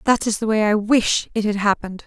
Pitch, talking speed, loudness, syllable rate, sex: 215 Hz, 260 wpm, -19 LUFS, 5.9 syllables/s, female